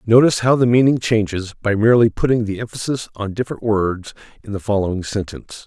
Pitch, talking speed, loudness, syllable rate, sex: 110 Hz, 180 wpm, -18 LUFS, 6.2 syllables/s, male